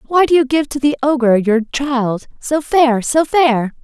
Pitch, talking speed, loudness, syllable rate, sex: 270 Hz, 205 wpm, -15 LUFS, 4.1 syllables/s, female